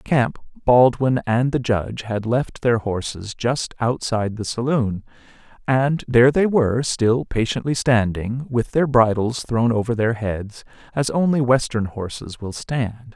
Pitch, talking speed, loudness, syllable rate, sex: 120 Hz, 150 wpm, -20 LUFS, 4.2 syllables/s, male